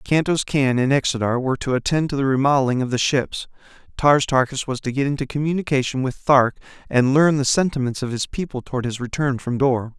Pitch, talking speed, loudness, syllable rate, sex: 135 Hz, 205 wpm, -20 LUFS, 5.8 syllables/s, male